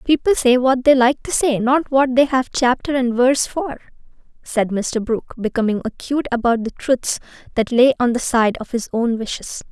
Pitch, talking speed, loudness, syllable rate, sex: 250 Hz, 200 wpm, -18 LUFS, 5.1 syllables/s, female